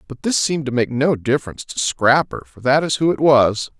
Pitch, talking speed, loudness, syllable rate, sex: 135 Hz, 235 wpm, -18 LUFS, 5.7 syllables/s, male